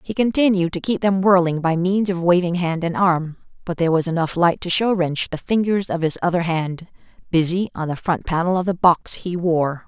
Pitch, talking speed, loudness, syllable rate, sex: 175 Hz, 225 wpm, -19 LUFS, 5.2 syllables/s, female